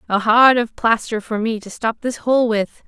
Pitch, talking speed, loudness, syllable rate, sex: 225 Hz, 230 wpm, -17 LUFS, 4.5 syllables/s, female